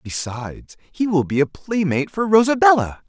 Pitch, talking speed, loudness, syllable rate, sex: 160 Hz, 155 wpm, -18 LUFS, 5.1 syllables/s, male